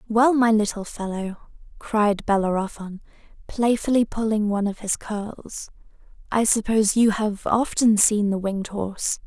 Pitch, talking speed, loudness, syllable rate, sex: 210 Hz, 135 wpm, -22 LUFS, 4.6 syllables/s, female